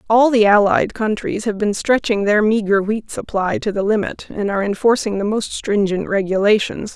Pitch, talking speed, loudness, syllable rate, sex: 210 Hz, 180 wpm, -17 LUFS, 5.1 syllables/s, female